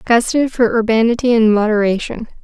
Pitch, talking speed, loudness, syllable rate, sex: 225 Hz, 125 wpm, -14 LUFS, 6.3 syllables/s, female